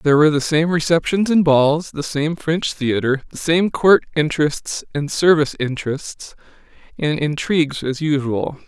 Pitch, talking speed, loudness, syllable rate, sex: 155 Hz, 150 wpm, -18 LUFS, 4.8 syllables/s, male